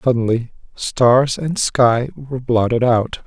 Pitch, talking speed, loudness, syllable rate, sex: 125 Hz, 130 wpm, -17 LUFS, 3.8 syllables/s, male